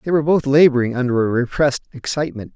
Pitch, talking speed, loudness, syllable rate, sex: 135 Hz, 190 wpm, -18 LUFS, 7.3 syllables/s, male